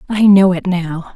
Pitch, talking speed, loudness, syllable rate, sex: 185 Hz, 210 wpm, -13 LUFS, 4.2 syllables/s, female